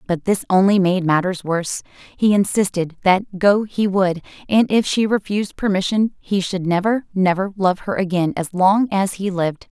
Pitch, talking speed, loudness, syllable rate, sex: 190 Hz, 180 wpm, -18 LUFS, 4.8 syllables/s, female